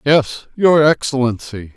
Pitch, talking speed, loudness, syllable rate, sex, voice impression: 135 Hz, 100 wpm, -15 LUFS, 3.9 syllables/s, male, masculine, slightly old, slightly powerful, slightly hard, halting, calm, mature, friendly, slightly wild, lively, kind